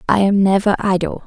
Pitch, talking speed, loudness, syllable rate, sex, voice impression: 195 Hz, 190 wpm, -16 LUFS, 5.7 syllables/s, female, very feminine, slightly adult-like, very thin, slightly tensed, slightly weak, dark, slightly hard, muffled, fluent, raspy, cute, intellectual, slightly refreshing, sincere, very calm, friendly, reassuring, very unique, slightly elegant, wild, very sweet, slightly lively, very kind, slightly sharp, very modest, light